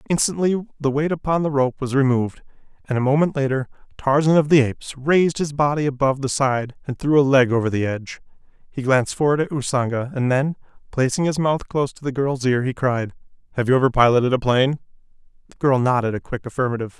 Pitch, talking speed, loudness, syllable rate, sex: 135 Hz, 205 wpm, -20 LUFS, 6.3 syllables/s, male